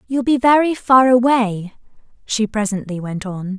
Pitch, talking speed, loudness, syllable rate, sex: 225 Hz, 150 wpm, -16 LUFS, 4.5 syllables/s, female